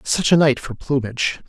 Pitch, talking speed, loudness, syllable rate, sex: 135 Hz, 205 wpm, -19 LUFS, 5.2 syllables/s, male